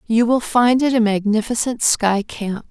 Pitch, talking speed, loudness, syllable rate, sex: 225 Hz, 175 wpm, -17 LUFS, 4.3 syllables/s, female